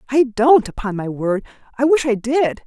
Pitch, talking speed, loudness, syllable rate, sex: 245 Hz, 180 wpm, -18 LUFS, 4.7 syllables/s, female